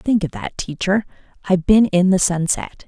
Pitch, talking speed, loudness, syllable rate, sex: 185 Hz, 190 wpm, -18 LUFS, 5.0 syllables/s, female